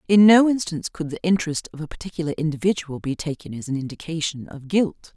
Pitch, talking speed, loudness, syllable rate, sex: 165 Hz, 200 wpm, -22 LUFS, 6.4 syllables/s, female